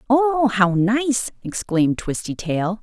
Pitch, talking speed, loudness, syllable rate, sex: 220 Hz, 125 wpm, -20 LUFS, 3.6 syllables/s, female